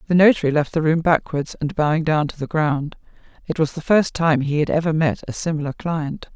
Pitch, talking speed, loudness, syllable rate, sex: 155 Hz, 225 wpm, -20 LUFS, 5.7 syllables/s, female